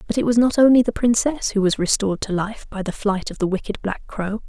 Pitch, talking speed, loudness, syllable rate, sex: 210 Hz, 270 wpm, -20 LUFS, 5.9 syllables/s, female